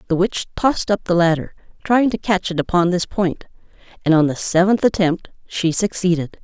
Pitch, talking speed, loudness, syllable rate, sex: 180 Hz, 185 wpm, -18 LUFS, 5.4 syllables/s, female